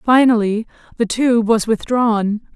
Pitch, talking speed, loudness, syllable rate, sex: 225 Hz, 115 wpm, -16 LUFS, 4.0 syllables/s, female